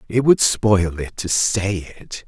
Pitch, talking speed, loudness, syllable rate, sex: 100 Hz, 185 wpm, -18 LUFS, 3.5 syllables/s, male